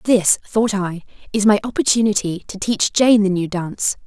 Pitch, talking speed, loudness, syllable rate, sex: 200 Hz, 175 wpm, -18 LUFS, 4.9 syllables/s, female